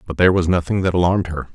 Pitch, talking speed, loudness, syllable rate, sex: 90 Hz, 270 wpm, -18 LUFS, 8.0 syllables/s, male